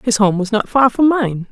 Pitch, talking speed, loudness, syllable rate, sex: 225 Hz, 275 wpm, -15 LUFS, 5.0 syllables/s, female